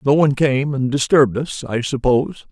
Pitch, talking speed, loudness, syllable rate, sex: 135 Hz, 190 wpm, -17 LUFS, 5.6 syllables/s, male